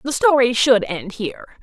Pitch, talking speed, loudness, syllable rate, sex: 240 Hz, 185 wpm, -18 LUFS, 5.0 syllables/s, female